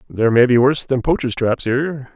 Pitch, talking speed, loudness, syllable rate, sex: 125 Hz, 220 wpm, -17 LUFS, 6.1 syllables/s, male